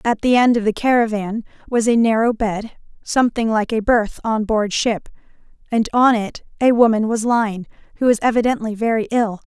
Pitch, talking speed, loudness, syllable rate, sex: 225 Hz, 185 wpm, -18 LUFS, 5.2 syllables/s, female